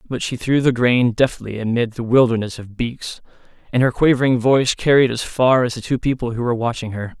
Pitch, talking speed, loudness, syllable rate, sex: 120 Hz, 215 wpm, -18 LUFS, 5.6 syllables/s, male